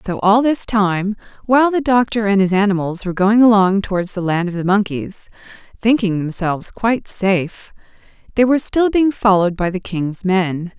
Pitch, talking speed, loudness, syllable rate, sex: 200 Hz, 180 wpm, -16 LUFS, 5.3 syllables/s, female